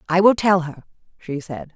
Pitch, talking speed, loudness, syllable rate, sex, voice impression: 175 Hz, 205 wpm, -19 LUFS, 4.9 syllables/s, female, very feminine, very adult-like, middle-aged, thin, tensed, powerful, bright, slightly hard, very clear, fluent, slightly raspy, slightly cute, cool, intellectual, refreshing, sincere, slightly calm, friendly, reassuring, unique, elegant, slightly wild, sweet, very lively, kind, slightly intense, light